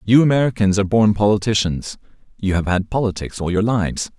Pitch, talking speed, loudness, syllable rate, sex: 105 Hz, 170 wpm, -18 LUFS, 6.0 syllables/s, male